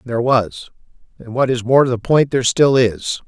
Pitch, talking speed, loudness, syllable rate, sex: 125 Hz, 220 wpm, -16 LUFS, 5.3 syllables/s, male